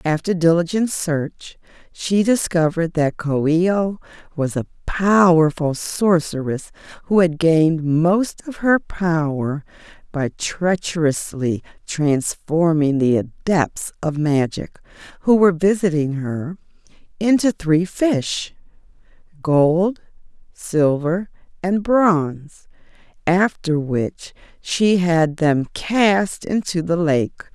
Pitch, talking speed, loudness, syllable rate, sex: 170 Hz, 100 wpm, -19 LUFS, 3.5 syllables/s, female